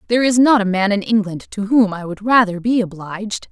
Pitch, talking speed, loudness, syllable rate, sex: 210 Hz, 240 wpm, -17 LUFS, 5.8 syllables/s, female